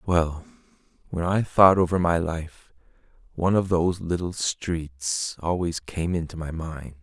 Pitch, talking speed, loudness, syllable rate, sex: 85 Hz, 145 wpm, -24 LUFS, 4.1 syllables/s, male